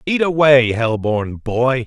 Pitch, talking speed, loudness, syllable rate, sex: 125 Hz, 160 wpm, -16 LUFS, 3.5 syllables/s, male